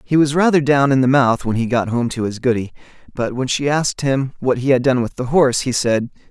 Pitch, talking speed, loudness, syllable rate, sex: 130 Hz, 265 wpm, -17 LUFS, 5.8 syllables/s, male